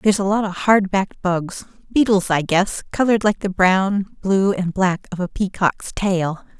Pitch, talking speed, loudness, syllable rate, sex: 190 Hz, 175 wpm, -19 LUFS, 4.6 syllables/s, female